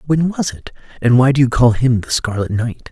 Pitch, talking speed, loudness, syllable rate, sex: 125 Hz, 245 wpm, -15 LUFS, 5.2 syllables/s, male